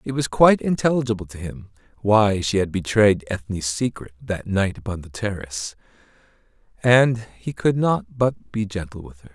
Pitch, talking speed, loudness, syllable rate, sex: 105 Hz, 165 wpm, -21 LUFS, 4.9 syllables/s, male